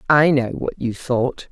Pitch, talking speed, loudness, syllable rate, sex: 130 Hz, 200 wpm, -20 LUFS, 3.9 syllables/s, female